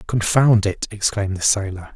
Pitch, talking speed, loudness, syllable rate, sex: 105 Hz, 155 wpm, -19 LUFS, 5.1 syllables/s, male